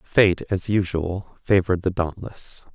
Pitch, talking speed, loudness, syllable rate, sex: 90 Hz, 130 wpm, -23 LUFS, 3.9 syllables/s, male